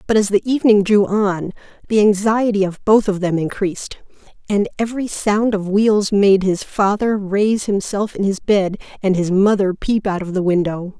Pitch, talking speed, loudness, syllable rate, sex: 200 Hz, 185 wpm, -17 LUFS, 4.9 syllables/s, female